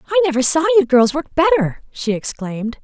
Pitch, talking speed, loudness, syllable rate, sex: 290 Hz, 190 wpm, -16 LUFS, 5.9 syllables/s, female